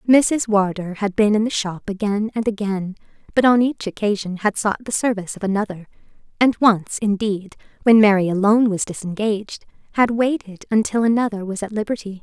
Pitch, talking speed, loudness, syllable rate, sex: 210 Hz, 170 wpm, -19 LUFS, 5.5 syllables/s, female